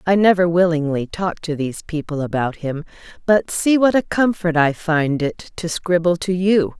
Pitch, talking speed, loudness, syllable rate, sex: 170 Hz, 185 wpm, -19 LUFS, 4.7 syllables/s, female